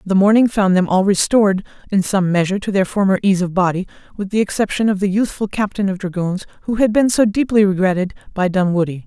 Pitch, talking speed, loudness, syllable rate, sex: 195 Hz, 210 wpm, -17 LUFS, 6.2 syllables/s, female